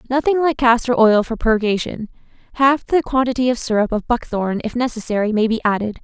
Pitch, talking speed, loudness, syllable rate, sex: 235 Hz, 180 wpm, -18 LUFS, 5.7 syllables/s, female